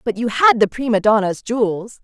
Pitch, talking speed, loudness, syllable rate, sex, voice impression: 225 Hz, 205 wpm, -17 LUFS, 5.2 syllables/s, female, very feminine, very middle-aged, very thin, very tensed, powerful, very bright, very hard, very clear, very fluent, cute, intellectual, refreshing, slightly sincere, slightly calm, friendly, reassuring, unique, slightly elegant, slightly wild, slightly sweet, lively, strict, intense, sharp